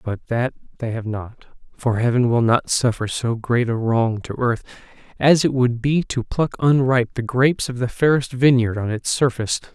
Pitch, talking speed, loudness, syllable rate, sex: 120 Hz, 195 wpm, -20 LUFS, 4.9 syllables/s, male